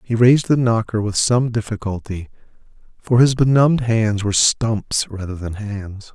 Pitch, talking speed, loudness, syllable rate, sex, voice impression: 110 Hz, 155 wpm, -18 LUFS, 4.7 syllables/s, male, masculine, adult-like, tensed, slightly weak, soft, cool, calm, reassuring, slightly wild, kind, modest